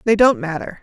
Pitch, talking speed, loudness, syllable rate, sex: 205 Hz, 220 wpm, -17 LUFS, 5.6 syllables/s, female